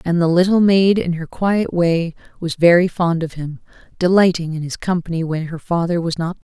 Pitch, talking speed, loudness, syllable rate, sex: 170 Hz, 210 wpm, -17 LUFS, 5.3 syllables/s, female